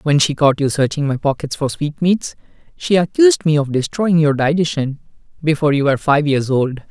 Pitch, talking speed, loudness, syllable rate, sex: 150 Hz, 190 wpm, -16 LUFS, 5.5 syllables/s, male